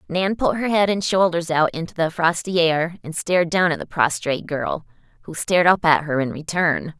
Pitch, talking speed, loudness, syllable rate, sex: 165 Hz, 215 wpm, -20 LUFS, 5.2 syllables/s, female